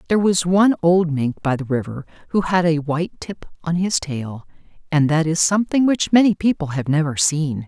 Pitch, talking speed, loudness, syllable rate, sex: 165 Hz, 205 wpm, -19 LUFS, 5.3 syllables/s, female